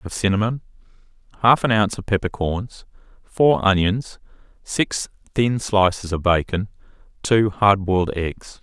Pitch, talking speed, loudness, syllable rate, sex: 100 Hz, 125 wpm, -20 LUFS, 4.4 syllables/s, male